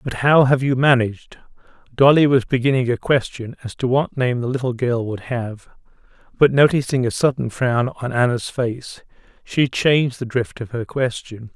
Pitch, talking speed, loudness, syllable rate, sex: 125 Hz, 175 wpm, -19 LUFS, 4.8 syllables/s, male